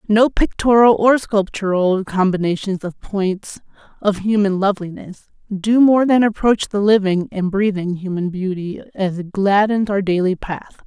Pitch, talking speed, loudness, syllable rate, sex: 200 Hz, 145 wpm, -17 LUFS, 4.5 syllables/s, female